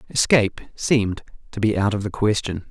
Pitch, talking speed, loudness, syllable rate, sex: 105 Hz, 180 wpm, -21 LUFS, 5.7 syllables/s, male